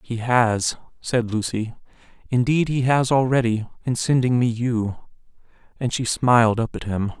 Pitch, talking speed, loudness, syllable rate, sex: 120 Hz, 150 wpm, -21 LUFS, 4.4 syllables/s, male